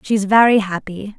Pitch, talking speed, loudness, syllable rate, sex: 205 Hz, 150 wpm, -15 LUFS, 4.6 syllables/s, female